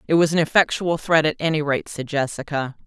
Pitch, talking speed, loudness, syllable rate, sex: 150 Hz, 210 wpm, -21 LUFS, 5.8 syllables/s, female